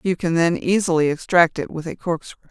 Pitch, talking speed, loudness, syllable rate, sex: 165 Hz, 215 wpm, -20 LUFS, 5.4 syllables/s, female